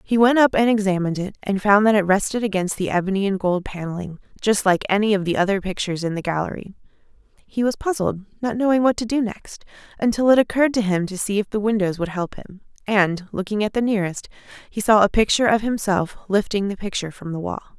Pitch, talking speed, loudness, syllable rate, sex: 205 Hz, 225 wpm, -21 LUFS, 6.2 syllables/s, female